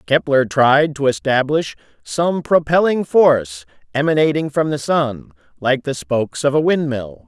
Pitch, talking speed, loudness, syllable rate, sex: 145 Hz, 140 wpm, -17 LUFS, 4.4 syllables/s, male